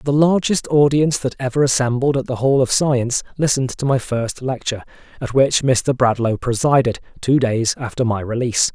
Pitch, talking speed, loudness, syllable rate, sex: 130 Hz, 180 wpm, -18 LUFS, 5.4 syllables/s, male